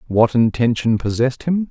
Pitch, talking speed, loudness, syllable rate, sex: 125 Hz, 140 wpm, -18 LUFS, 5.2 syllables/s, male